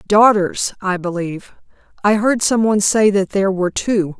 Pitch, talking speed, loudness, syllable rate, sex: 200 Hz, 155 wpm, -16 LUFS, 5.2 syllables/s, female